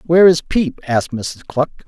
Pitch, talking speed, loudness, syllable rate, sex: 150 Hz, 190 wpm, -16 LUFS, 4.9 syllables/s, male